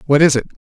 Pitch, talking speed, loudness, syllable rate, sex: 140 Hz, 285 wpm, -14 LUFS, 7.7 syllables/s, male